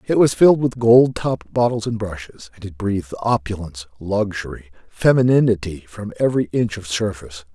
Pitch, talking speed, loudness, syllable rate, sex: 100 Hz, 160 wpm, -19 LUFS, 5.6 syllables/s, male